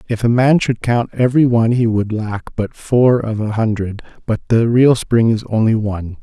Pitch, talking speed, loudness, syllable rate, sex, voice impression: 115 Hz, 210 wpm, -16 LUFS, 5.0 syllables/s, male, masculine, middle-aged, tensed, powerful, soft, clear, slightly raspy, intellectual, calm, mature, friendly, reassuring, wild, slightly lively, kind